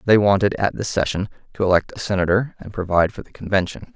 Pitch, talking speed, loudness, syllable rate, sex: 95 Hz, 215 wpm, -20 LUFS, 6.6 syllables/s, male